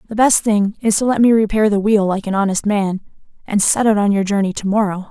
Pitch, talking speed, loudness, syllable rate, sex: 205 Hz, 260 wpm, -16 LUFS, 5.8 syllables/s, female